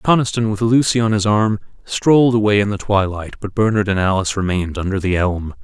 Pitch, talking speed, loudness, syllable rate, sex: 105 Hz, 200 wpm, -17 LUFS, 5.9 syllables/s, male